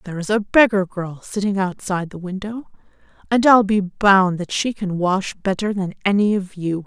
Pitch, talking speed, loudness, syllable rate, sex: 195 Hz, 190 wpm, -19 LUFS, 5.0 syllables/s, female